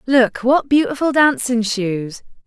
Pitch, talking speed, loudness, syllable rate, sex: 245 Hz, 120 wpm, -17 LUFS, 3.8 syllables/s, female